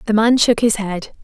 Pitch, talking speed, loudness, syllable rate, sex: 220 Hz, 240 wpm, -16 LUFS, 5.1 syllables/s, female